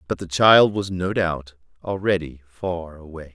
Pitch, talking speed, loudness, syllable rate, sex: 85 Hz, 160 wpm, -20 LUFS, 4.1 syllables/s, male